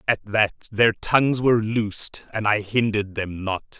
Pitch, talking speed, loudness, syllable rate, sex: 105 Hz, 175 wpm, -22 LUFS, 4.5 syllables/s, male